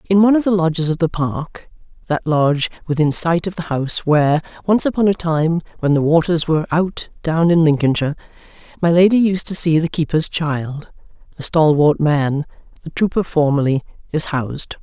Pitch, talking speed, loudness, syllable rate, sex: 160 Hz, 170 wpm, -17 LUFS, 5.4 syllables/s, female